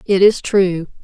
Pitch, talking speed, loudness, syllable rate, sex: 190 Hz, 175 wpm, -15 LUFS, 3.9 syllables/s, female